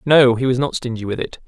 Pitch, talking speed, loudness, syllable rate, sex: 125 Hz, 285 wpm, -18 LUFS, 6.0 syllables/s, male